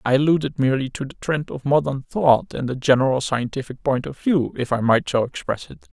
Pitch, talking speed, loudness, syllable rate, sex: 135 Hz, 220 wpm, -21 LUFS, 5.6 syllables/s, male